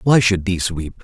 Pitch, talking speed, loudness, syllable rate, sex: 95 Hz, 235 wpm, -18 LUFS, 5.4 syllables/s, male